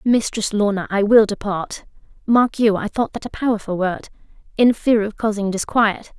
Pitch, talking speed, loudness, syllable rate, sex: 210 Hz, 155 wpm, -19 LUFS, 5.1 syllables/s, female